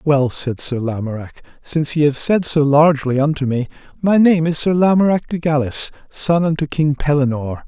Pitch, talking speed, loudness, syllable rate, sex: 150 Hz, 180 wpm, -17 LUFS, 5.3 syllables/s, male